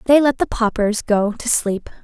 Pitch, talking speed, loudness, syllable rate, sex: 225 Hz, 205 wpm, -18 LUFS, 4.6 syllables/s, female